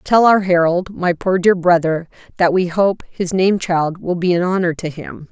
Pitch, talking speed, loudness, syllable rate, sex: 180 Hz, 190 wpm, -16 LUFS, 4.5 syllables/s, female